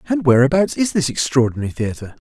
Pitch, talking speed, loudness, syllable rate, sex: 145 Hz, 160 wpm, -17 LUFS, 6.5 syllables/s, male